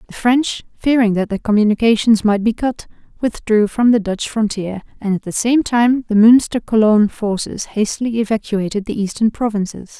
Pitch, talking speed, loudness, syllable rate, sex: 220 Hz, 170 wpm, -16 LUFS, 5.1 syllables/s, female